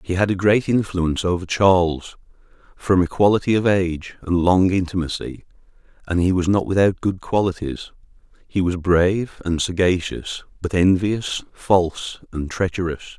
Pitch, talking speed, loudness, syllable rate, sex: 90 Hz, 135 wpm, -20 LUFS, 4.7 syllables/s, male